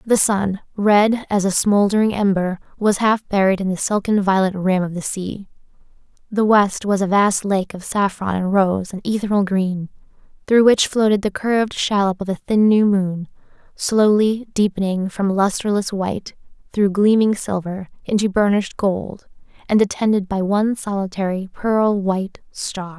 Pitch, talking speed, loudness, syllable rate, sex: 200 Hz, 160 wpm, -18 LUFS, 4.6 syllables/s, female